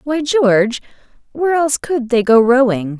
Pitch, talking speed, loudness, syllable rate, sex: 255 Hz, 160 wpm, -14 LUFS, 5.1 syllables/s, female